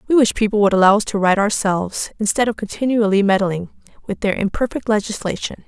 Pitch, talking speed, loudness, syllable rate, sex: 205 Hz, 180 wpm, -18 LUFS, 6.1 syllables/s, female